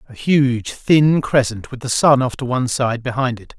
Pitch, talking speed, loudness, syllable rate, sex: 130 Hz, 220 wpm, -17 LUFS, 4.7 syllables/s, male